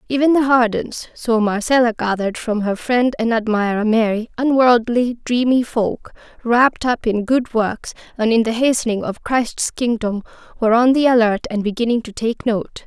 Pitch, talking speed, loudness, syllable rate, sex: 230 Hz, 160 wpm, -17 LUFS, 4.8 syllables/s, female